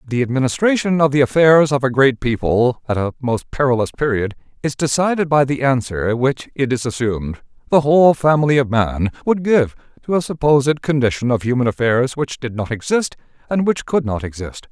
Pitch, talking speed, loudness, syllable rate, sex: 130 Hz, 190 wpm, -17 LUFS, 5.4 syllables/s, male